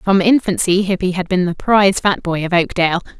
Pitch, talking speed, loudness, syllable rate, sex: 185 Hz, 205 wpm, -15 LUFS, 5.7 syllables/s, female